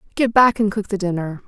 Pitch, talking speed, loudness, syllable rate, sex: 205 Hz, 245 wpm, -18 LUFS, 6.2 syllables/s, female